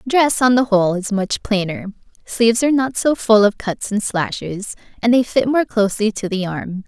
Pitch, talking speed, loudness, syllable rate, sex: 220 Hz, 210 wpm, -17 LUFS, 5.1 syllables/s, female